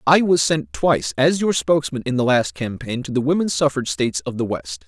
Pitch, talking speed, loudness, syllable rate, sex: 145 Hz, 235 wpm, -20 LUFS, 5.8 syllables/s, male